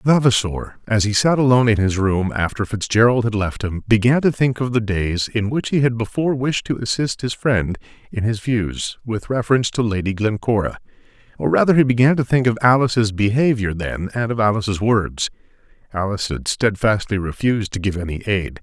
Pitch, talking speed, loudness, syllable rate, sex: 110 Hz, 185 wpm, -19 LUFS, 5.5 syllables/s, male